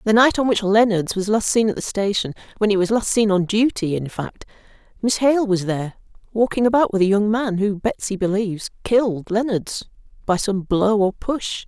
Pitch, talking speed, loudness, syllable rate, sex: 210 Hz, 195 wpm, -20 LUFS, 5.2 syllables/s, female